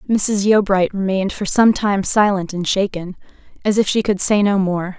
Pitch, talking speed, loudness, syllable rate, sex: 195 Hz, 195 wpm, -17 LUFS, 4.9 syllables/s, female